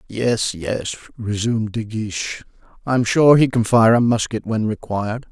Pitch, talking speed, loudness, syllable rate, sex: 110 Hz, 170 wpm, -19 LUFS, 4.7 syllables/s, male